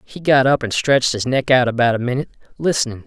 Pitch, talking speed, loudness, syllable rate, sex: 125 Hz, 235 wpm, -17 LUFS, 6.7 syllables/s, male